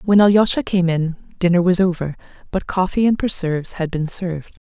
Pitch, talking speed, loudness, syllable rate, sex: 180 Hz, 180 wpm, -18 LUFS, 5.7 syllables/s, female